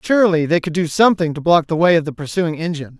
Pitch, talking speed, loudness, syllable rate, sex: 165 Hz, 260 wpm, -17 LUFS, 6.9 syllables/s, male